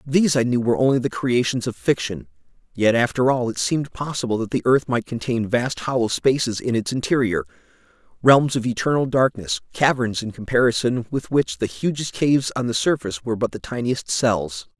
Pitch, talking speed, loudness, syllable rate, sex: 125 Hz, 180 wpm, -21 LUFS, 5.6 syllables/s, male